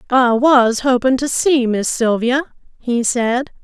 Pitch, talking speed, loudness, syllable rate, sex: 250 Hz, 150 wpm, -15 LUFS, 3.7 syllables/s, female